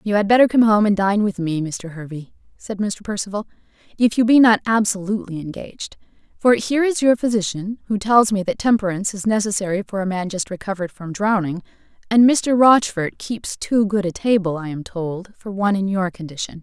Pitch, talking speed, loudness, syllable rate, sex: 200 Hz, 200 wpm, -19 LUFS, 5.6 syllables/s, female